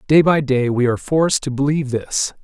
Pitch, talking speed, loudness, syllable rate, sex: 140 Hz, 220 wpm, -18 LUFS, 5.9 syllables/s, male